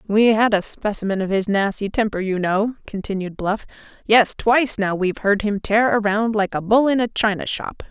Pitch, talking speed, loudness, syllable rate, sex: 210 Hz, 205 wpm, -19 LUFS, 5.2 syllables/s, female